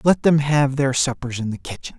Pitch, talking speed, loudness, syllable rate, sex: 135 Hz, 240 wpm, -20 LUFS, 5.3 syllables/s, male